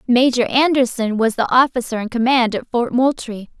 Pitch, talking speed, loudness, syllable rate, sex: 245 Hz, 165 wpm, -17 LUFS, 5.1 syllables/s, female